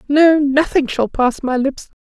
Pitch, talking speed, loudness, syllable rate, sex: 280 Hz, 175 wpm, -16 LUFS, 4.1 syllables/s, female